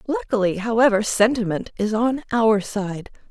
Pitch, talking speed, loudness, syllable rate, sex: 215 Hz, 125 wpm, -20 LUFS, 4.5 syllables/s, female